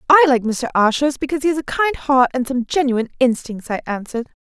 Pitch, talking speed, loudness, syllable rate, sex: 265 Hz, 215 wpm, -18 LUFS, 6.2 syllables/s, female